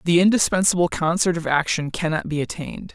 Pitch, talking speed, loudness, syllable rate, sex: 170 Hz, 165 wpm, -21 LUFS, 6.1 syllables/s, male